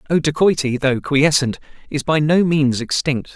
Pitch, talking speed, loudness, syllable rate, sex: 145 Hz, 160 wpm, -17 LUFS, 4.6 syllables/s, male